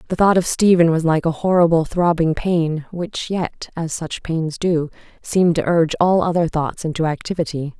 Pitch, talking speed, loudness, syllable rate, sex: 165 Hz, 185 wpm, -18 LUFS, 5.0 syllables/s, female